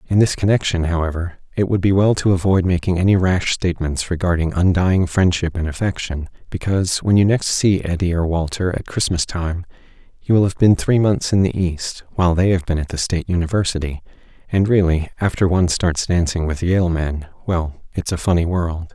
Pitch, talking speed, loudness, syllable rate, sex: 90 Hz, 190 wpm, -18 LUFS, 5.5 syllables/s, male